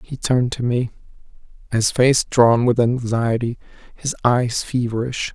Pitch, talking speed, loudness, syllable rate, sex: 120 Hz, 135 wpm, -19 LUFS, 4.2 syllables/s, male